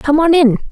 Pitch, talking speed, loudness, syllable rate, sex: 295 Hz, 250 wpm, -11 LUFS, 5.3 syllables/s, female